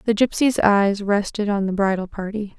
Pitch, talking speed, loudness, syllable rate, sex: 205 Hz, 185 wpm, -20 LUFS, 4.9 syllables/s, female